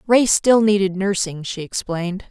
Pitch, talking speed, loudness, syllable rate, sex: 195 Hz, 155 wpm, -19 LUFS, 4.6 syllables/s, female